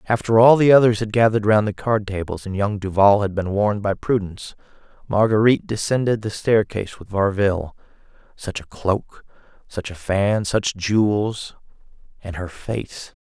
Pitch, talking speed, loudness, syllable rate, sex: 105 Hz, 155 wpm, -19 LUFS, 5.0 syllables/s, male